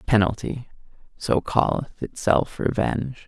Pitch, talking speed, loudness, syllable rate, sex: 115 Hz, 90 wpm, -24 LUFS, 4.2 syllables/s, male